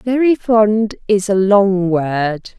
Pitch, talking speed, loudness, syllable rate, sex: 205 Hz, 140 wpm, -15 LUFS, 2.8 syllables/s, female